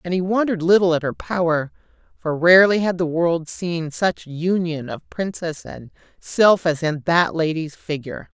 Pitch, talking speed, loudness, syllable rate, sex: 170 Hz, 170 wpm, -20 LUFS, 4.7 syllables/s, female